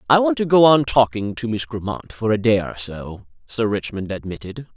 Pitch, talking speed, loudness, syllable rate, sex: 115 Hz, 215 wpm, -19 LUFS, 5.1 syllables/s, male